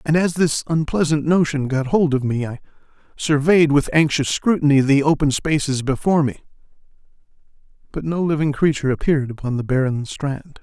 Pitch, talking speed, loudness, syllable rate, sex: 145 Hz, 160 wpm, -19 LUFS, 5.5 syllables/s, male